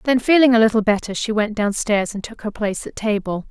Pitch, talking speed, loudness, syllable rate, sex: 215 Hz, 240 wpm, -19 LUFS, 5.9 syllables/s, female